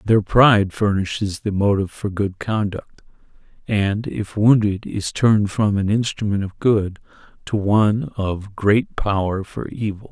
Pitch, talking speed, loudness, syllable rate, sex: 105 Hz, 150 wpm, -20 LUFS, 4.3 syllables/s, male